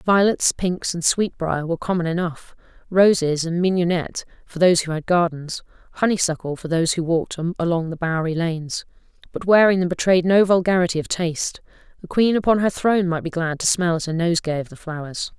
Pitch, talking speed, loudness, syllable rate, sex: 175 Hz, 185 wpm, -20 LUFS, 5.9 syllables/s, female